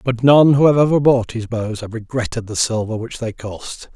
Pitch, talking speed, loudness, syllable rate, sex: 120 Hz, 230 wpm, -17 LUFS, 5.0 syllables/s, male